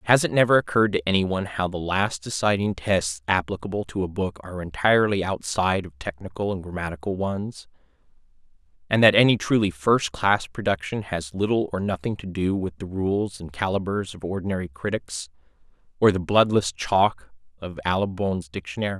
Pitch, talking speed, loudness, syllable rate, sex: 95 Hz, 160 wpm, -24 LUFS, 5.5 syllables/s, male